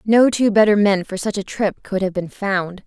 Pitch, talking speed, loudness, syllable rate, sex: 200 Hz, 250 wpm, -18 LUFS, 4.7 syllables/s, female